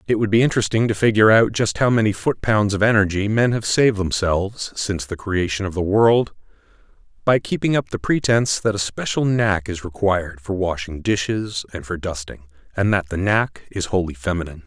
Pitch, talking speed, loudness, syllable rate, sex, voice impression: 100 Hz, 195 wpm, -20 LUFS, 5.6 syllables/s, male, very masculine, very middle-aged, very thick, tensed, very powerful, bright, soft, clear, very fluent, raspy, very cool, intellectual, slightly refreshing, sincere, calm, very mature, very friendly, reassuring, very unique, slightly elegant, wild, slightly sweet, lively, kind, intense